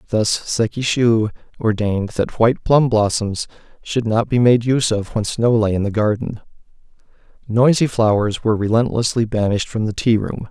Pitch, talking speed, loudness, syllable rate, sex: 110 Hz, 160 wpm, -18 LUFS, 5.1 syllables/s, male